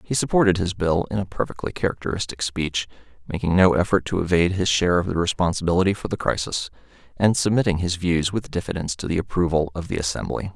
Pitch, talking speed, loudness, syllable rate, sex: 90 Hz, 195 wpm, -22 LUFS, 6.5 syllables/s, male